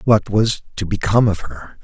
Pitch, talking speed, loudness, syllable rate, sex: 105 Hz, 195 wpm, -18 LUFS, 5.0 syllables/s, male